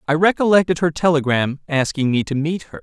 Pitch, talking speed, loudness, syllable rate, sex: 155 Hz, 190 wpm, -18 LUFS, 5.8 syllables/s, male